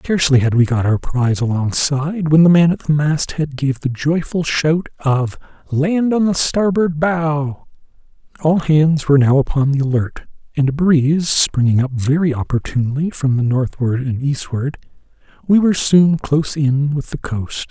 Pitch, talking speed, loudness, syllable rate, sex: 145 Hz, 170 wpm, -16 LUFS, 4.7 syllables/s, male